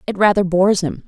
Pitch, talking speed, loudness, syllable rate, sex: 185 Hz, 225 wpm, -16 LUFS, 6.5 syllables/s, female